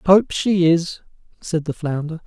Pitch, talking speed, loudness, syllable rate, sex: 170 Hz, 160 wpm, -19 LUFS, 4.0 syllables/s, male